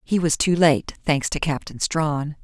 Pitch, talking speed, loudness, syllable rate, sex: 155 Hz, 175 wpm, -21 LUFS, 4.2 syllables/s, female